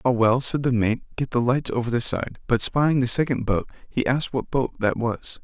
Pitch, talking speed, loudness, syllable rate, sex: 125 Hz, 245 wpm, -23 LUFS, 5.2 syllables/s, male